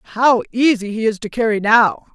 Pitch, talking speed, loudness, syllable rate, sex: 225 Hz, 195 wpm, -16 LUFS, 4.6 syllables/s, female